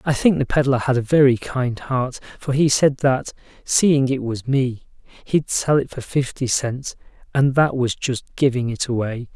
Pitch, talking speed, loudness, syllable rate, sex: 130 Hz, 190 wpm, -20 LUFS, 4.4 syllables/s, male